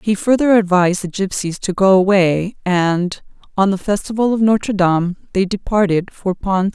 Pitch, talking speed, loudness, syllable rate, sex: 195 Hz, 170 wpm, -16 LUFS, 5.1 syllables/s, female